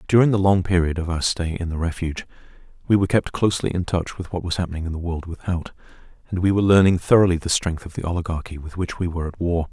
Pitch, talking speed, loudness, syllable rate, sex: 90 Hz, 245 wpm, -22 LUFS, 6.9 syllables/s, male